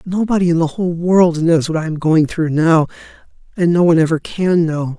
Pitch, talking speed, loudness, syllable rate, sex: 165 Hz, 215 wpm, -15 LUFS, 5.5 syllables/s, male